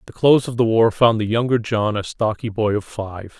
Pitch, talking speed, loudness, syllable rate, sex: 110 Hz, 245 wpm, -19 LUFS, 5.3 syllables/s, male